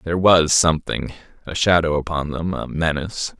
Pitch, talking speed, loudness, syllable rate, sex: 80 Hz, 140 wpm, -19 LUFS, 5.4 syllables/s, male